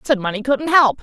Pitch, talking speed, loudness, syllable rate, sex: 250 Hz, 235 wpm, -17 LUFS, 5.4 syllables/s, female